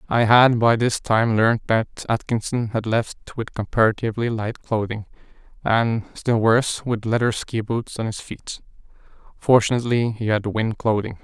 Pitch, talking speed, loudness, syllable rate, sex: 115 Hz, 155 wpm, -21 LUFS, 4.6 syllables/s, male